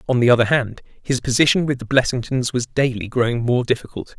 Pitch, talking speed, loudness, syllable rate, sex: 125 Hz, 200 wpm, -19 LUFS, 6.1 syllables/s, male